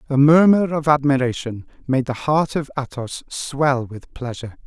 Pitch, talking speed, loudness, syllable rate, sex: 135 Hz, 155 wpm, -19 LUFS, 4.7 syllables/s, male